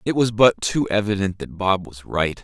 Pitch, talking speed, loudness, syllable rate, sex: 100 Hz, 220 wpm, -21 LUFS, 4.9 syllables/s, male